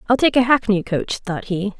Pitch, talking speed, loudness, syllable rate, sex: 210 Hz, 235 wpm, -19 LUFS, 5.0 syllables/s, female